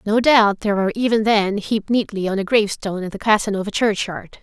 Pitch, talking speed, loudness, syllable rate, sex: 210 Hz, 205 wpm, -19 LUFS, 6.1 syllables/s, female